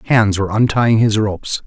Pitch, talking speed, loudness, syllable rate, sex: 105 Hz, 180 wpm, -15 LUFS, 5.5 syllables/s, male